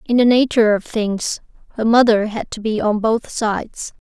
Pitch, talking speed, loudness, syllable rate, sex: 220 Hz, 190 wpm, -17 LUFS, 4.9 syllables/s, female